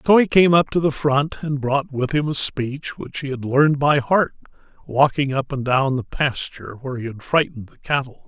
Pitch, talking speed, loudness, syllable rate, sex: 140 Hz, 225 wpm, -20 LUFS, 5.2 syllables/s, male